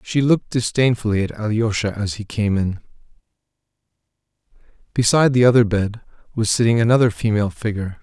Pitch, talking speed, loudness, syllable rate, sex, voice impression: 110 Hz, 135 wpm, -19 LUFS, 6.2 syllables/s, male, masculine, adult-like, intellectual, calm, slightly sweet